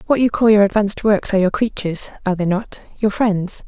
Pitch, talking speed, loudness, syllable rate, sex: 205 Hz, 215 wpm, -17 LUFS, 6.2 syllables/s, female